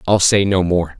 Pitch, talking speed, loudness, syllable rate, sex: 90 Hz, 240 wpm, -15 LUFS, 4.7 syllables/s, male